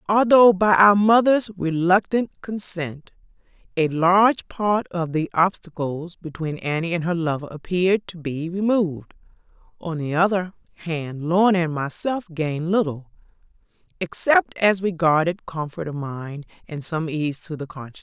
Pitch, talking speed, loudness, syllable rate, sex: 175 Hz, 140 wpm, -21 LUFS, 4.6 syllables/s, female